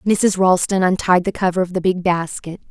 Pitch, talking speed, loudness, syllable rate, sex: 185 Hz, 200 wpm, -17 LUFS, 5.0 syllables/s, female